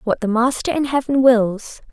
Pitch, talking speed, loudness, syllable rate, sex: 245 Hz, 190 wpm, -17 LUFS, 4.6 syllables/s, female